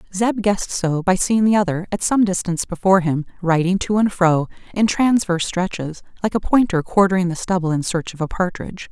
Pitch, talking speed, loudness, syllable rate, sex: 185 Hz, 200 wpm, -19 LUFS, 5.8 syllables/s, female